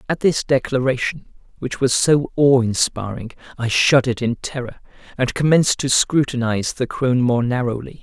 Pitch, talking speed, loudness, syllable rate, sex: 130 Hz, 150 wpm, -18 LUFS, 5.2 syllables/s, male